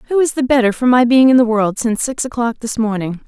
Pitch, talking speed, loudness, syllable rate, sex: 240 Hz, 275 wpm, -15 LUFS, 6.2 syllables/s, female